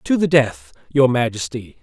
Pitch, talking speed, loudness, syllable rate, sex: 120 Hz, 165 wpm, -18 LUFS, 4.7 syllables/s, male